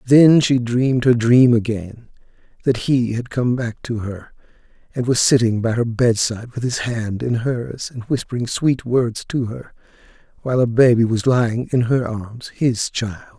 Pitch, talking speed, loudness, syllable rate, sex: 120 Hz, 175 wpm, -18 LUFS, 4.5 syllables/s, male